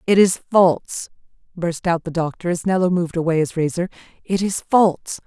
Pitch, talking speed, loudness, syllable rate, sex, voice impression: 175 Hz, 180 wpm, -19 LUFS, 5.5 syllables/s, female, feminine, very adult-like, slightly refreshing, sincere, calm